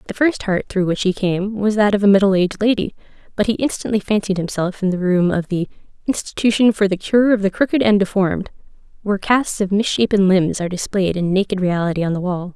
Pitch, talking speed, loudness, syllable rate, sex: 195 Hz, 225 wpm, -18 LUFS, 6.1 syllables/s, female